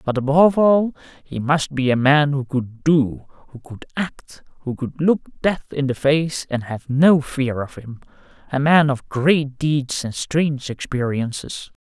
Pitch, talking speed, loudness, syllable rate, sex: 140 Hz, 180 wpm, -19 LUFS, 4.1 syllables/s, male